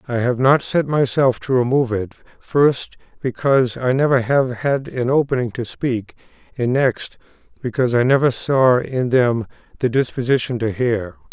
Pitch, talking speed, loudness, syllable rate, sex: 125 Hz, 160 wpm, -18 LUFS, 4.7 syllables/s, male